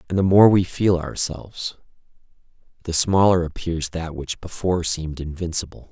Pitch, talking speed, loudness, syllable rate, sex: 85 Hz, 140 wpm, -21 LUFS, 5.1 syllables/s, male